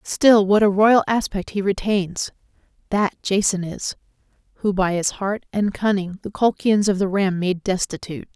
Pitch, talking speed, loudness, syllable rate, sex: 200 Hz, 165 wpm, -20 LUFS, 4.6 syllables/s, female